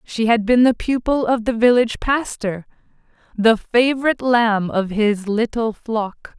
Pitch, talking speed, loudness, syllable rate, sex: 230 Hz, 150 wpm, -18 LUFS, 4.3 syllables/s, female